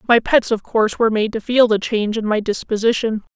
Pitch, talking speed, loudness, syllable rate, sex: 220 Hz, 230 wpm, -18 LUFS, 6.1 syllables/s, female